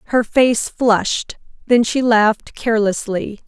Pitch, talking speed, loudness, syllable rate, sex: 225 Hz, 120 wpm, -17 LUFS, 4.1 syllables/s, female